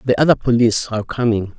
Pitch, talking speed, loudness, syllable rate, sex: 115 Hz, 190 wpm, -17 LUFS, 7.2 syllables/s, male